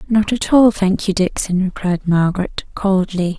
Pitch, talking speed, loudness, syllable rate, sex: 195 Hz, 160 wpm, -17 LUFS, 4.4 syllables/s, female